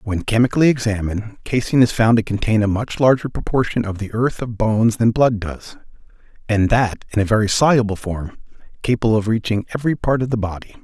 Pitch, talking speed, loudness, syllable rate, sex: 110 Hz, 195 wpm, -18 LUFS, 6.1 syllables/s, male